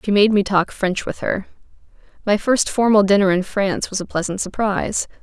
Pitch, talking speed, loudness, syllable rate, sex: 200 Hz, 195 wpm, -19 LUFS, 5.5 syllables/s, female